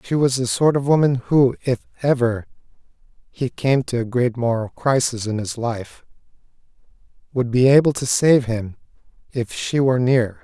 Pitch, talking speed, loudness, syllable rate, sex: 125 Hz, 165 wpm, -19 LUFS, 4.7 syllables/s, male